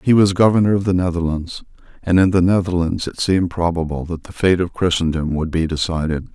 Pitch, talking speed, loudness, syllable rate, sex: 90 Hz, 200 wpm, -18 LUFS, 5.8 syllables/s, male